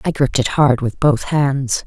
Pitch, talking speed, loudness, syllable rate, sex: 135 Hz, 225 wpm, -16 LUFS, 4.5 syllables/s, female